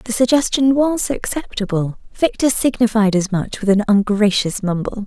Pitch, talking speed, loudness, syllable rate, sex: 220 Hz, 140 wpm, -17 LUFS, 4.8 syllables/s, female